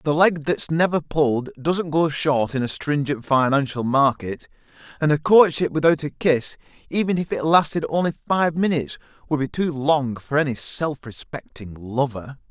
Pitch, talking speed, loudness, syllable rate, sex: 145 Hz, 170 wpm, -21 LUFS, 4.7 syllables/s, male